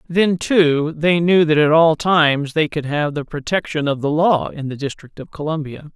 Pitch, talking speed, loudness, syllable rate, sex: 155 Hz, 210 wpm, -17 LUFS, 4.7 syllables/s, male